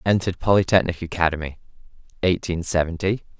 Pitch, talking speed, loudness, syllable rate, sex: 90 Hz, 90 wpm, -22 LUFS, 6.3 syllables/s, male